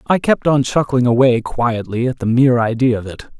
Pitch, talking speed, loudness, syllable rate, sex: 125 Hz, 210 wpm, -16 LUFS, 5.3 syllables/s, male